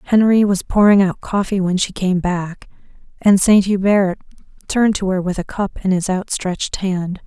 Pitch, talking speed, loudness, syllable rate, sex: 190 Hz, 180 wpm, -17 LUFS, 4.8 syllables/s, female